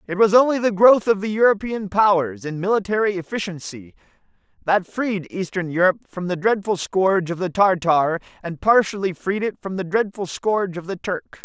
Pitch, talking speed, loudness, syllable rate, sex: 190 Hz, 180 wpm, -20 LUFS, 5.4 syllables/s, male